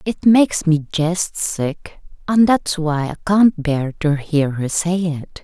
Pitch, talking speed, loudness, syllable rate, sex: 165 Hz, 175 wpm, -18 LUFS, 3.5 syllables/s, female